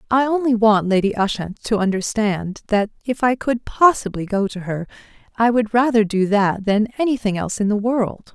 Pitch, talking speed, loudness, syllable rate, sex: 220 Hz, 185 wpm, -19 LUFS, 5.0 syllables/s, female